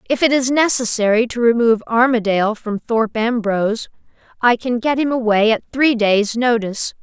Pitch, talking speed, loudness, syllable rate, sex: 230 Hz, 160 wpm, -17 LUFS, 5.3 syllables/s, female